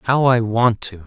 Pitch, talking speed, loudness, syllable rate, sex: 115 Hz, 225 wpm, -17 LUFS, 3.9 syllables/s, male